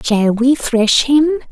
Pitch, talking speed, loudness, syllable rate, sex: 260 Hz, 160 wpm, -13 LUFS, 3.0 syllables/s, female